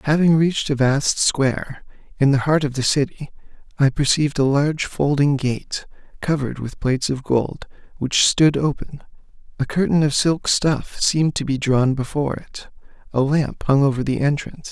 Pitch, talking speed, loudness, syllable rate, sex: 140 Hz, 170 wpm, -19 LUFS, 5.0 syllables/s, male